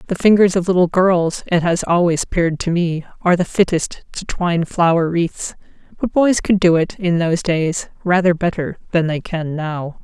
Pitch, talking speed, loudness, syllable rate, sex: 175 Hz, 190 wpm, -17 LUFS, 5.0 syllables/s, female